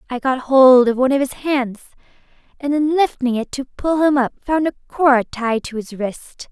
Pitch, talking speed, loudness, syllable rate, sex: 265 Hz, 210 wpm, -17 LUFS, 4.6 syllables/s, female